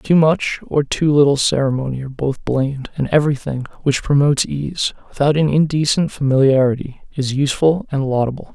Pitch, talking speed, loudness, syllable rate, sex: 140 Hz, 155 wpm, -17 LUFS, 5.6 syllables/s, male